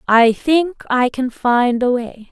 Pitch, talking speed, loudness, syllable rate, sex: 255 Hz, 180 wpm, -16 LUFS, 3.4 syllables/s, female